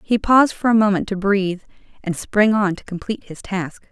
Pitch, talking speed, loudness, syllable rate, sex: 200 Hz, 215 wpm, -19 LUFS, 5.6 syllables/s, female